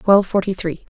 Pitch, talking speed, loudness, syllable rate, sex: 190 Hz, 190 wpm, -19 LUFS, 5.8 syllables/s, female